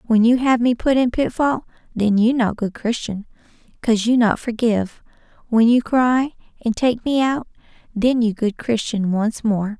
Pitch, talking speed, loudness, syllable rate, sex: 230 Hz, 180 wpm, -19 LUFS, 4.6 syllables/s, female